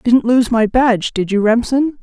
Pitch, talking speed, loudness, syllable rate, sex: 235 Hz, 205 wpm, -14 LUFS, 4.5 syllables/s, female